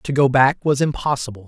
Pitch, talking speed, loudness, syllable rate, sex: 135 Hz, 205 wpm, -18 LUFS, 5.6 syllables/s, male